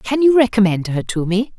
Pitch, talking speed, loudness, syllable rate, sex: 220 Hz, 230 wpm, -16 LUFS, 5.3 syllables/s, female